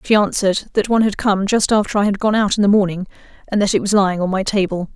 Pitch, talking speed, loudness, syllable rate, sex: 200 Hz, 280 wpm, -17 LUFS, 6.9 syllables/s, female